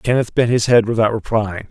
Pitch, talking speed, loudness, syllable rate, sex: 110 Hz, 210 wpm, -16 LUFS, 5.4 syllables/s, male